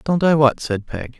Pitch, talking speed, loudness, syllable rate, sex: 135 Hz, 250 wpm, -18 LUFS, 4.6 syllables/s, male